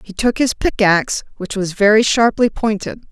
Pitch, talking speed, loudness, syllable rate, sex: 210 Hz, 195 wpm, -16 LUFS, 4.9 syllables/s, female